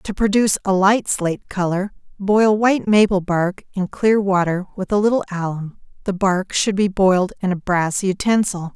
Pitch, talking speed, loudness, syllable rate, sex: 195 Hz, 170 wpm, -18 LUFS, 4.9 syllables/s, female